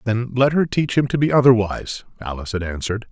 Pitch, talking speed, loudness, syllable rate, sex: 115 Hz, 210 wpm, -19 LUFS, 6.4 syllables/s, male